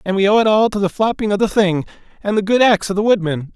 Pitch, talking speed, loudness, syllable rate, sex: 200 Hz, 305 wpm, -16 LUFS, 6.8 syllables/s, male